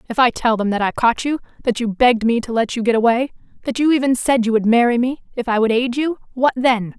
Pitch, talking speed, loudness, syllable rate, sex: 240 Hz, 265 wpm, -18 LUFS, 6.1 syllables/s, female